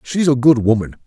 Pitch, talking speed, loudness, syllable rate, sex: 130 Hz, 225 wpm, -15 LUFS, 5.6 syllables/s, male